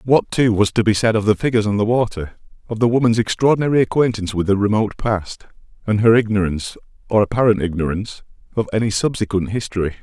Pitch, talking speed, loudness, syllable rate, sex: 105 Hz, 185 wpm, -18 LUFS, 6.7 syllables/s, male